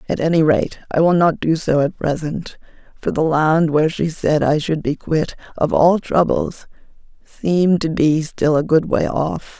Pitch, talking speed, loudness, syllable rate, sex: 160 Hz, 195 wpm, -17 LUFS, 4.5 syllables/s, female